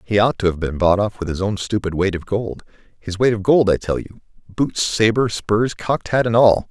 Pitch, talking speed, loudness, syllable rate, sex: 105 Hz, 240 wpm, -19 LUFS, 5.2 syllables/s, male